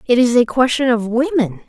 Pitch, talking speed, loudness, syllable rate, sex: 245 Hz, 215 wpm, -16 LUFS, 5.3 syllables/s, female